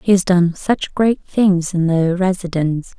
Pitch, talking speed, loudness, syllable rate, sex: 180 Hz, 180 wpm, -17 LUFS, 3.8 syllables/s, female